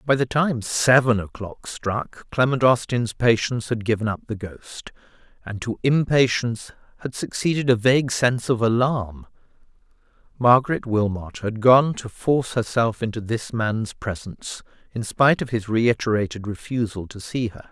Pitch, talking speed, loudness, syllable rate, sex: 115 Hz, 150 wpm, -22 LUFS, 4.8 syllables/s, male